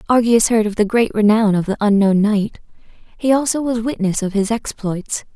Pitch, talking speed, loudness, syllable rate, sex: 215 Hz, 190 wpm, -17 LUFS, 5.1 syllables/s, female